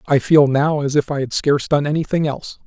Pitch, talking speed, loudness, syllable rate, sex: 145 Hz, 245 wpm, -17 LUFS, 6.0 syllables/s, male